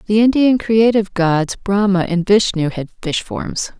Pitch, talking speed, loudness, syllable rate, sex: 200 Hz, 160 wpm, -16 LUFS, 4.4 syllables/s, female